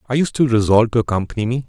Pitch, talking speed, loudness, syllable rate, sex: 120 Hz, 250 wpm, -17 LUFS, 8.3 syllables/s, male